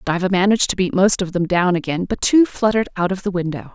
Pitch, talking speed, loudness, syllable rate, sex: 185 Hz, 255 wpm, -18 LUFS, 6.3 syllables/s, female